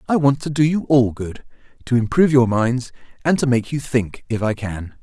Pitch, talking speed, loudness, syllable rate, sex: 125 Hz, 215 wpm, -19 LUFS, 5.2 syllables/s, male